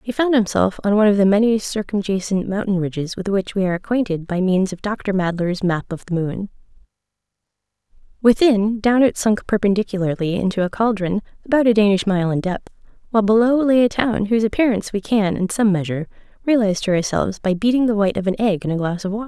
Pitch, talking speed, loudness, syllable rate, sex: 205 Hz, 205 wpm, -19 LUFS, 6.3 syllables/s, female